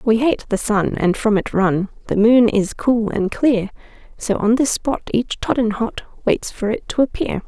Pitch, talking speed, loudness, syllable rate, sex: 225 Hz, 200 wpm, -18 LUFS, 4.4 syllables/s, female